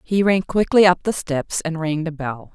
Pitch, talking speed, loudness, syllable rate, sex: 170 Hz, 235 wpm, -19 LUFS, 4.5 syllables/s, female